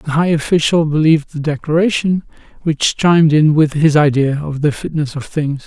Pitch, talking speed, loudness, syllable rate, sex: 155 Hz, 180 wpm, -15 LUFS, 5.1 syllables/s, male